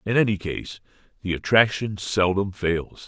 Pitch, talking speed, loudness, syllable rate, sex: 100 Hz, 135 wpm, -23 LUFS, 4.4 syllables/s, male